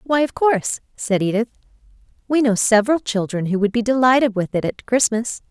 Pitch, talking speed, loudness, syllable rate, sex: 225 Hz, 185 wpm, -19 LUFS, 5.7 syllables/s, female